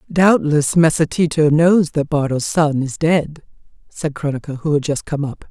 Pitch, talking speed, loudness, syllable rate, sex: 155 Hz, 175 wpm, -17 LUFS, 4.6 syllables/s, female